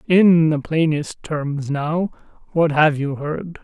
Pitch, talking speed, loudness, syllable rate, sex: 155 Hz, 150 wpm, -19 LUFS, 3.3 syllables/s, female